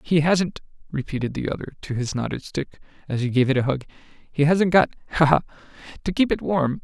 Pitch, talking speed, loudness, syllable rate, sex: 150 Hz, 185 wpm, -23 LUFS, 5.8 syllables/s, male